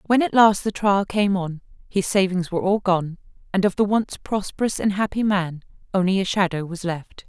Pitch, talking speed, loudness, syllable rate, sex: 190 Hz, 205 wpm, -22 LUFS, 5.2 syllables/s, female